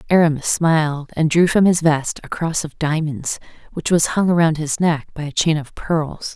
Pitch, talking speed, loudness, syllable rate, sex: 160 Hz, 210 wpm, -18 LUFS, 4.8 syllables/s, female